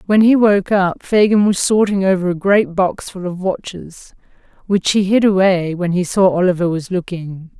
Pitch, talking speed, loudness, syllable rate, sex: 190 Hz, 190 wpm, -15 LUFS, 4.7 syllables/s, female